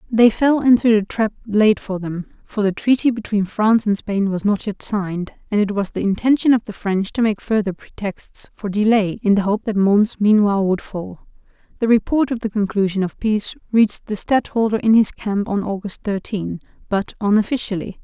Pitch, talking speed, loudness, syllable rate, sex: 210 Hz, 195 wpm, -19 LUFS, 5.2 syllables/s, female